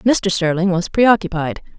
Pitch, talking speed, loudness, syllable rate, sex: 185 Hz, 135 wpm, -17 LUFS, 4.3 syllables/s, female